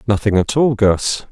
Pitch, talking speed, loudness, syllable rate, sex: 110 Hz, 185 wpm, -15 LUFS, 4.4 syllables/s, male